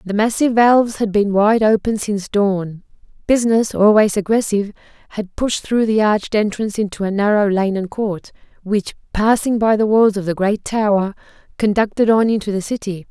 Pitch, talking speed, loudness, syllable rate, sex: 210 Hz, 175 wpm, -17 LUFS, 5.4 syllables/s, female